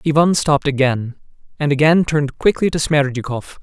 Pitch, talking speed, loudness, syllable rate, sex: 145 Hz, 150 wpm, -17 LUFS, 5.6 syllables/s, male